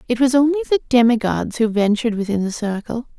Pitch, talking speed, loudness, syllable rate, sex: 235 Hz, 190 wpm, -18 LUFS, 6.3 syllables/s, female